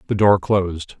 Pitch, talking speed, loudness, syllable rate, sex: 95 Hz, 180 wpm, -18 LUFS, 5.1 syllables/s, male